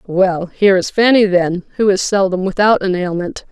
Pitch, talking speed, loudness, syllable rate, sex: 195 Hz, 190 wpm, -14 LUFS, 4.9 syllables/s, female